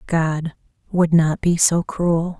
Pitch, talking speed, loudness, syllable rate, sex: 165 Hz, 150 wpm, -19 LUFS, 3.2 syllables/s, female